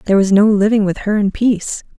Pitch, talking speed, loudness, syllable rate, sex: 205 Hz, 240 wpm, -14 LUFS, 6.5 syllables/s, female